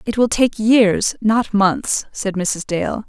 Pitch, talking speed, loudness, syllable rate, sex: 215 Hz, 155 wpm, -17 LUFS, 3.3 syllables/s, female